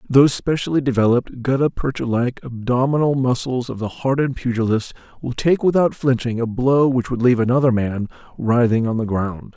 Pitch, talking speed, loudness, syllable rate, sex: 125 Hz, 170 wpm, -19 LUFS, 5.6 syllables/s, male